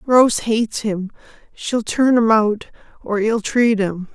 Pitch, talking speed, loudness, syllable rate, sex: 220 Hz, 130 wpm, -18 LUFS, 3.7 syllables/s, female